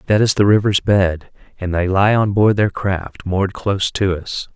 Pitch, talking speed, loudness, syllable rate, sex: 100 Hz, 210 wpm, -17 LUFS, 4.7 syllables/s, male